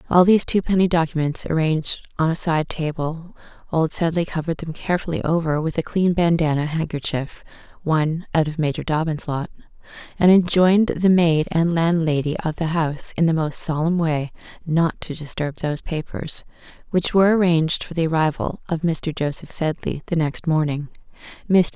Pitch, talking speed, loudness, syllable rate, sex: 160 Hz, 165 wpm, -21 LUFS, 5.1 syllables/s, female